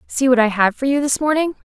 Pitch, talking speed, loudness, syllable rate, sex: 265 Hz, 280 wpm, -17 LUFS, 6.3 syllables/s, female